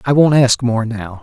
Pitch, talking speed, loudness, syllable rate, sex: 125 Hz, 245 wpm, -14 LUFS, 4.5 syllables/s, male